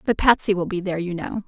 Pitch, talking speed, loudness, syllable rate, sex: 190 Hz, 285 wpm, -22 LUFS, 6.7 syllables/s, female